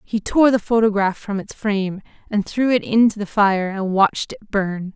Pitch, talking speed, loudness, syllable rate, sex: 205 Hz, 205 wpm, -19 LUFS, 4.9 syllables/s, female